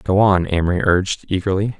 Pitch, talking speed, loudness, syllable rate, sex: 95 Hz, 165 wpm, -18 LUFS, 5.7 syllables/s, male